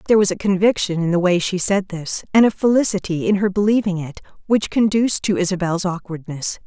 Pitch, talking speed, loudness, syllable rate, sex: 190 Hz, 200 wpm, -19 LUFS, 6.0 syllables/s, female